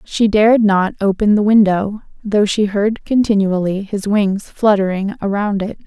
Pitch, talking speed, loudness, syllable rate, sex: 205 Hz, 155 wpm, -15 LUFS, 4.3 syllables/s, female